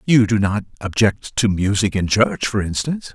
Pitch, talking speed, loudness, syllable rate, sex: 105 Hz, 190 wpm, -19 LUFS, 4.8 syllables/s, male